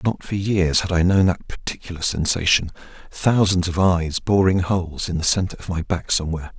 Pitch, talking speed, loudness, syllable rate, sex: 90 Hz, 180 wpm, -20 LUFS, 5.5 syllables/s, male